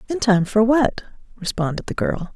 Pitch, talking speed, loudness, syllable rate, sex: 210 Hz, 180 wpm, -20 LUFS, 5.0 syllables/s, female